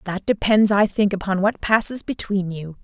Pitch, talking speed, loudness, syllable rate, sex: 200 Hz, 190 wpm, -20 LUFS, 4.8 syllables/s, female